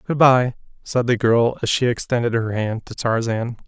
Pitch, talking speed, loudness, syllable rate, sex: 120 Hz, 195 wpm, -20 LUFS, 4.7 syllables/s, male